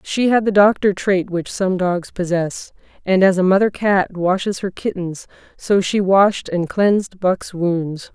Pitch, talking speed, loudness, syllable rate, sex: 190 Hz, 175 wpm, -18 LUFS, 4.0 syllables/s, female